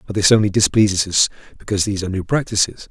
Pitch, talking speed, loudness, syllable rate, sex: 100 Hz, 205 wpm, -17 LUFS, 7.7 syllables/s, male